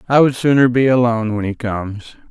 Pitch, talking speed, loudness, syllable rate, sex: 120 Hz, 210 wpm, -16 LUFS, 5.9 syllables/s, male